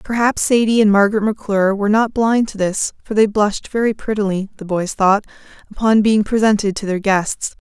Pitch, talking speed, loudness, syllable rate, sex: 210 Hz, 190 wpm, -16 LUFS, 5.7 syllables/s, female